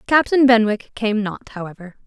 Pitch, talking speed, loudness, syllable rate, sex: 225 Hz, 145 wpm, -17 LUFS, 5.0 syllables/s, female